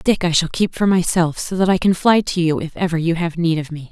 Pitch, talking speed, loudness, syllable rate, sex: 170 Hz, 320 wpm, -18 LUFS, 6.2 syllables/s, female